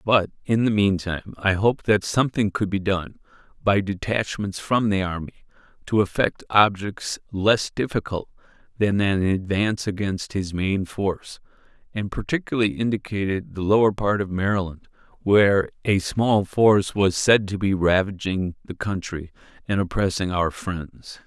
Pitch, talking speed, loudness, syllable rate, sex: 100 Hz, 145 wpm, -22 LUFS, 4.7 syllables/s, male